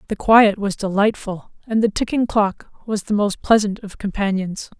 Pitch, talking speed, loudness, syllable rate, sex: 205 Hz, 175 wpm, -19 LUFS, 4.6 syllables/s, female